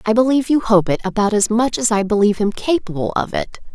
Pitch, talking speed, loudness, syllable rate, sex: 220 Hz, 240 wpm, -17 LUFS, 6.3 syllables/s, female